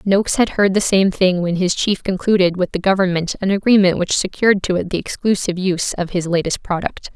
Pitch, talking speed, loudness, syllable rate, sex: 190 Hz, 220 wpm, -17 LUFS, 5.9 syllables/s, female